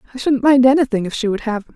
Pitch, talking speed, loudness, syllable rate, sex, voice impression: 245 Hz, 310 wpm, -16 LUFS, 7.8 syllables/s, female, feminine, slightly adult-like, slightly thin, soft, muffled, reassuring, slightly sweet, kind, slightly modest